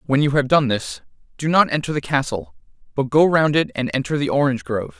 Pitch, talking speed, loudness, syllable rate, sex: 140 Hz, 230 wpm, -19 LUFS, 6.1 syllables/s, male